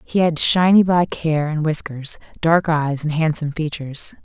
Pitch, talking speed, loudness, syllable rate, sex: 155 Hz, 170 wpm, -18 LUFS, 4.7 syllables/s, female